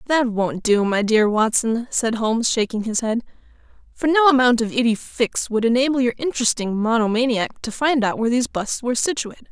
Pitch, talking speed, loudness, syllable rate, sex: 235 Hz, 190 wpm, -20 LUFS, 5.7 syllables/s, female